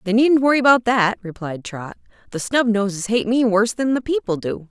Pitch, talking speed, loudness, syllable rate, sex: 220 Hz, 205 wpm, -19 LUFS, 5.2 syllables/s, female